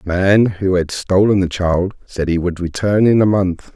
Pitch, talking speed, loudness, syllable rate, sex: 95 Hz, 225 wpm, -16 LUFS, 4.5 syllables/s, male